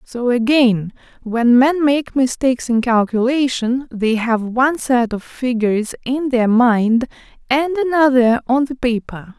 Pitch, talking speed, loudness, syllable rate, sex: 250 Hz, 140 wpm, -16 LUFS, 4.2 syllables/s, female